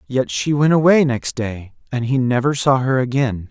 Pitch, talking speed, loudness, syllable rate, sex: 130 Hz, 205 wpm, -18 LUFS, 4.7 syllables/s, male